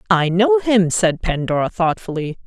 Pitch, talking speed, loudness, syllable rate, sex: 170 Hz, 145 wpm, -18 LUFS, 4.5 syllables/s, female